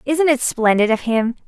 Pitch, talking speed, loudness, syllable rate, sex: 250 Hz, 205 wpm, -17 LUFS, 4.7 syllables/s, female